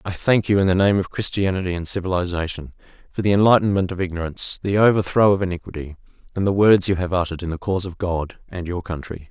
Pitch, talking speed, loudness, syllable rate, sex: 90 Hz, 215 wpm, -20 LUFS, 6.6 syllables/s, male